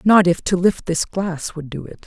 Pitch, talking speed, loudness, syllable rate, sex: 175 Hz, 260 wpm, -19 LUFS, 4.7 syllables/s, female